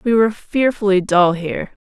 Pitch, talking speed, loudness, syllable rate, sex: 200 Hz, 165 wpm, -17 LUFS, 5.4 syllables/s, female